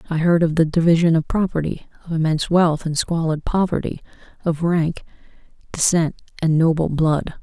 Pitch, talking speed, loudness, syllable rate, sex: 165 Hz, 155 wpm, -19 LUFS, 5.4 syllables/s, female